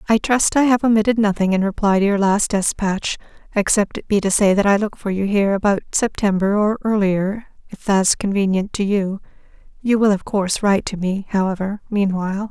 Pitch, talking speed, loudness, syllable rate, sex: 200 Hz, 195 wpm, -18 LUFS, 5.6 syllables/s, female